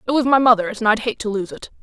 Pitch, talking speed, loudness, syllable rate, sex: 230 Hz, 330 wpm, -18 LUFS, 7.0 syllables/s, female